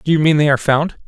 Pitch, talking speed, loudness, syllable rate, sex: 150 Hz, 335 wpm, -15 LUFS, 7.2 syllables/s, male